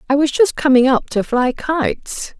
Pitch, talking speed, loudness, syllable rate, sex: 275 Hz, 200 wpm, -16 LUFS, 4.6 syllables/s, female